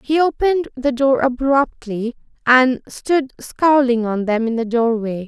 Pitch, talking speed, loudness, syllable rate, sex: 255 Hz, 150 wpm, -18 LUFS, 4.1 syllables/s, female